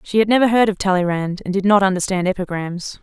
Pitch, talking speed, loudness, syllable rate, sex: 190 Hz, 220 wpm, -18 LUFS, 6.3 syllables/s, female